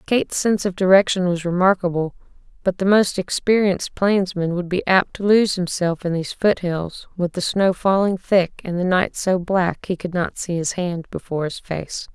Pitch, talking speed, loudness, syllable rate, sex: 185 Hz, 195 wpm, -20 LUFS, 4.9 syllables/s, female